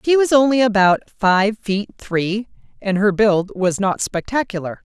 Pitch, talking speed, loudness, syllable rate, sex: 210 Hz, 160 wpm, -18 LUFS, 4.4 syllables/s, female